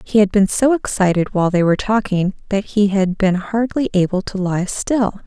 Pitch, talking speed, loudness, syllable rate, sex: 200 Hz, 205 wpm, -17 LUFS, 5.1 syllables/s, female